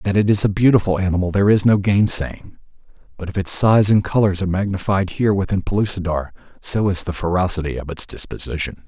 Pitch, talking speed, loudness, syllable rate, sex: 95 Hz, 190 wpm, -18 LUFS, 6.2 syllables/s, male